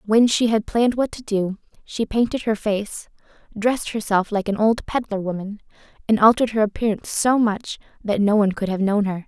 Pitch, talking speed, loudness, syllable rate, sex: 215 Hz, 200 wpm, -21 LUFS, 5.5 syllables/s, female